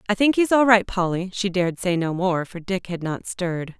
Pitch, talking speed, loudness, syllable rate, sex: 190 Hz, 255 wpm, -22 LUFS, 5.3 syllables/s, female